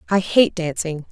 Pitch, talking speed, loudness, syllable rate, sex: 175 Hz, 160 wpm, -19 LUFS, 4.6 syllables/s, female